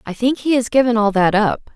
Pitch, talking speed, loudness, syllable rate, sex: 230 Hz, 275 wpm, -16 LUFS, 5.9 syllables/s, female